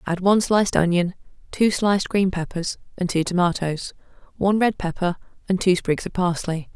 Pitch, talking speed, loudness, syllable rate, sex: 185 Hz, 170 wpm, -22 LUFS, 5.4 syllables/s, female